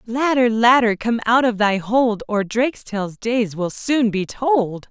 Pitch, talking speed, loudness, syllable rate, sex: 230 Hz, 170 wpm, -19 LUFS, 3.9 syllables/s, female